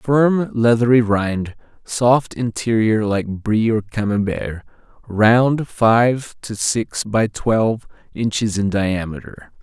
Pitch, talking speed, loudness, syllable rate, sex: 110 Hz, 110 wpm, -18 LUFS, 3.3 syllables/s, male